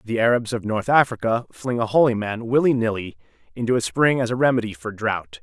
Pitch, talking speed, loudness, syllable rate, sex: 115 Hz, 210 wpm, -21 LUFS, 5.8 syllables/s, male